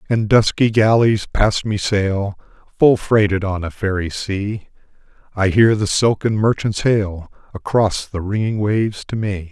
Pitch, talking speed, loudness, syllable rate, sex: 105 Hz, 150 wpm, -17 LUFS, 4.1 syllables/s, male